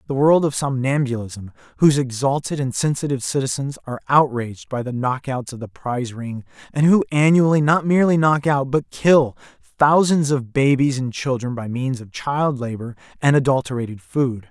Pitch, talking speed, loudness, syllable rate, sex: 135 Hz, 165 wpm, -19 LUFS, 5.3 syllables/s, male